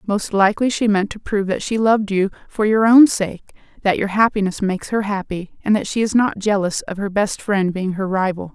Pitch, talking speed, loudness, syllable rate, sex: 200 Hz, 230 wpm, -18 LUFS, 5.6 syllables/s, female